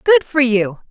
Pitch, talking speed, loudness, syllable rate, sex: 260 Hz, 200 wpm, -15 LUFS, 4.2 syllables/s, female